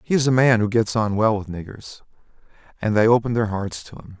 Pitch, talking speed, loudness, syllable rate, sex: 110 Hz, 245 wpm, -20 LUFS, 5.8 syllables/s, male